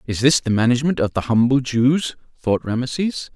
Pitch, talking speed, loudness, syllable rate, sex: 125 Hz, 180 wpm, -19 LUFS, 5.3 syllables/s, male